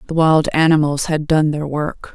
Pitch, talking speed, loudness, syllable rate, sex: 155 Hz, 195 wpm, -16 LUFS, 4.6 syllables/s, female